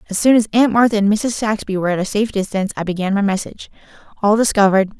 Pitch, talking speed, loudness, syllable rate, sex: 205 Hz, 230 wpm, -16 LUFS, 7.5 syllables/s, female